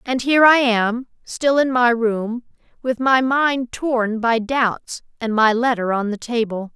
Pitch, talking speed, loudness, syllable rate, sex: 240 Hz, 180 wpm, -18 LUFS, 3.9 syllables/s, female